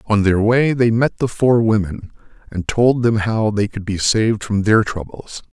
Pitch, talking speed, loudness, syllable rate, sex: 110 Hz, 205 wpm, -17 LUFS, 4.4 syllables/s, male